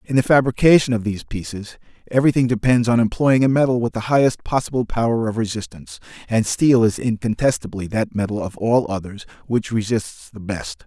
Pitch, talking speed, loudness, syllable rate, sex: 115 Hz, 175 wpm, -19 LUFS, 5.7 syllables/s, male